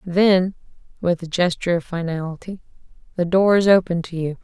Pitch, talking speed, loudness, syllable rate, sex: 175 Hz, 160 wpm, -20 LUFS, 5.5 syllables/s, female